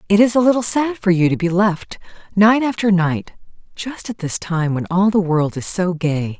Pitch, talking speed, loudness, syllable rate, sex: 190 Hz, 225 wpm, -17 LUFS, 4.7 syllables/s, female